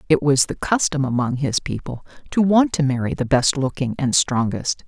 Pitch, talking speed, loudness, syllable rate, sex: 140 Hz, 195 wpm, -20 LUFS, 5.0 syllables/s, female